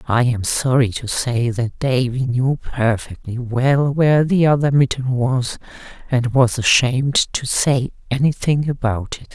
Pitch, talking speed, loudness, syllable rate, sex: 130 Hz, 150 wpm, -18 LUFS, 4.2 syllables/s, female